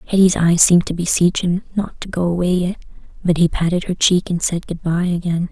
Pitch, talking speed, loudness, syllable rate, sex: 175 Hz, 230 wpm, -17 LUFS, 5.7 syllables/s, female